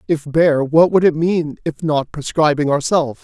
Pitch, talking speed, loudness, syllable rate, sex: 155 Hz, 185 wpm, -16 LUFS, 4.7 syllables/s, male